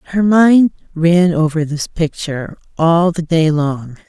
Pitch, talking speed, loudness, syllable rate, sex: 165 Hz, 145 wpm, -14 LUFS, 4.0 syllables/s, female